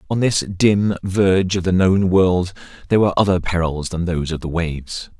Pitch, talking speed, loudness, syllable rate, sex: 90 Hz, 195 wpm, -18 LUFS, 5.4 syllables/s, male